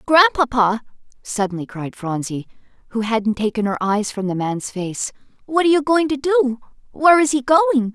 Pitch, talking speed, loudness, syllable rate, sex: 245 Hz, 165 wpm, -19 LUFS, 5.2 syllables/s, female